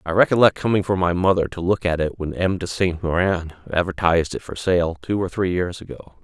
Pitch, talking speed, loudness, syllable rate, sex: 90 Hz, 230 wpm, -21 LUFS, 5.7 syllables/s, male